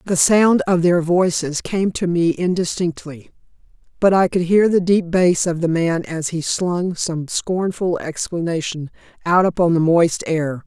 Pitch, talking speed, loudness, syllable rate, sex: 175 Hz, 170 wpm, -18 LUFS, 4.1 syllables/s, female